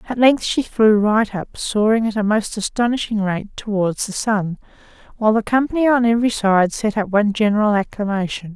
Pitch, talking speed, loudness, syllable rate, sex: 215 Hz, 180 wpm, -18 LUFS, 5.5 syllables/s, female